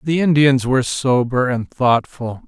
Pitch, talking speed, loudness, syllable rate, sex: 130 Hz, 145 wpm, -16 LUFS, 4.3 syllables/s, male